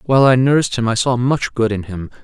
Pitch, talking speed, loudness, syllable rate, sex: 120 Hz, 270 wpm, -16 LUFS, 5.9 syllables/s, male